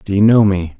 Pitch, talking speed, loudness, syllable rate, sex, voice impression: 100 Hz, 305 wpm, -12 LUFS, 5.8 syllables/s, male, masculine, middle-aged, tensed, slightly powerful, weak, slightly muffled, slightly raspy, sincere, calm, mature, slightly wild, kind, modest